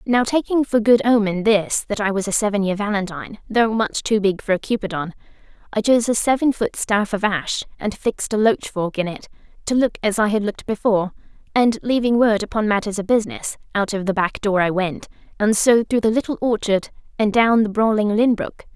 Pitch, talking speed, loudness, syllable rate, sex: 215 Hz, 220 wpm, -19 LUFS, 5.6 syllables/s, female